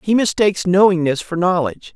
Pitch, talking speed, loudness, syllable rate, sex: 180 Hz, 155 wpm, -16 LUFS, 6.0 syllables/s, female